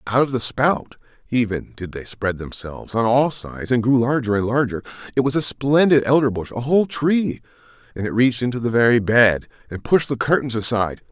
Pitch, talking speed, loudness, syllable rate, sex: 120 Hz, 200 wpm, -19 LUFS, 5.6 syllables/s, male